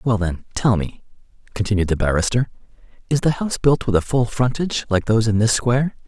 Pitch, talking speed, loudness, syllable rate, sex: 115 Hz, 195 wpm, -20 LUFS, 6.2 syllables/s, male